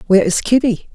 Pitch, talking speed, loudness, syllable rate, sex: 220 Hz, 190 wpm, -15 LUFS, 6.8 syllables/s, female